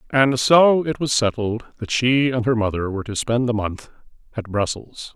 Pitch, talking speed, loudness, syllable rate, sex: 120 Hz, 200 wpm, -20 LUFS, 4.8 syllables/s, male